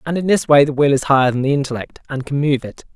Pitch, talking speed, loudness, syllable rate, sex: 140 Hz, 305 wpm, -16 LUFS, 6.7 syllables/s, male